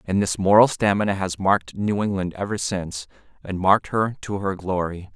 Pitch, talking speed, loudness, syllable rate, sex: 95 Hz, 185 wpm, -22 LUFS, 5.4 syllables/s, male